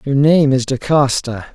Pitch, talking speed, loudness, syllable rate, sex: 135 Hz, 155 wpm, -14 LUFS, 4.1 syllables/s, male